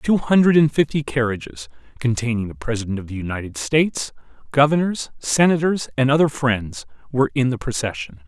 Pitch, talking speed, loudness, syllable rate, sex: 125 Hz, 150 wpm, -20 LUFS, 5.7 syllables/s, male